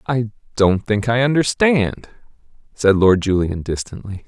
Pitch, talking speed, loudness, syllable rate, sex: 110 Hz, 125 wpm, -18 LUFS, 4.4 syllables/s, male